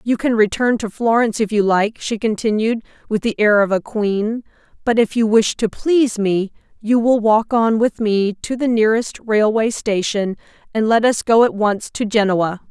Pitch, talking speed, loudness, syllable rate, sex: 220 Hz, 200 wpm, -17 LUFS, 4.7 syllables/s, female